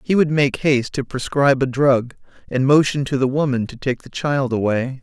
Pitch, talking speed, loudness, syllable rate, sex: 135 Hz, 215 wpm, -19 LUFS, 5.2 syllables/s, male